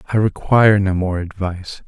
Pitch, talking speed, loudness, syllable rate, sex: 95 Hz, 160 wpm, -17 LUFS, 5.6 syllables/s, male